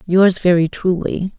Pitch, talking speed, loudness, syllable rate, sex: 180 Hz, 130 wpm, -16 LUFS, 3.9 syllables/s, female